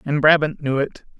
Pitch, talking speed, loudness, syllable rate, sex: 145 Hz, 200 wpm, -19 LUFS, 5.3 syllables/s, male